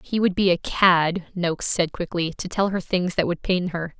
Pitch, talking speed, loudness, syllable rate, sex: 180 Hz, 240 wpm, -22 LUFS, 4.8 syllables/s, female